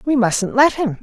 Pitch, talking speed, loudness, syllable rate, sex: 245 Hz, 235 wpm, -16 LUFS, 4.4 syllables/s, female